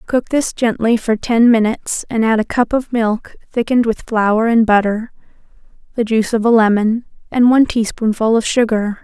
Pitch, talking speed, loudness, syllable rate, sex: 225 Hz, 180 wpm, -15 LUFS, 5.1 syllables/s, female